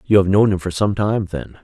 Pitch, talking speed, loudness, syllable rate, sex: 95 Hz, 295 wpm, -18 LUFS, 5.3 syllables/s, male